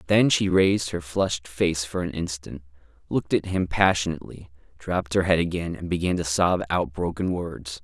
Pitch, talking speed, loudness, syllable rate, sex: 85 Hz, 185 wpm, -24 LUFS, 5.3 syllables/s, male